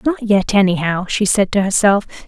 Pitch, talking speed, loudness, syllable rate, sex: 205 Hz, 185 wpm, -15 LUFS, 4.6 syllables/s, female